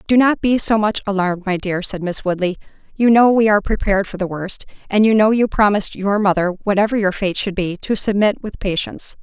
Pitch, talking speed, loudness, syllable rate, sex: 200 Hz, 230 wpm, -17 LUFS, 5.9 syllables/s, female